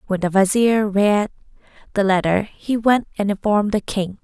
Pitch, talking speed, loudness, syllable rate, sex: 205 Hz, 170 wpm, -19 LUFS, 4.8 syllables/s, female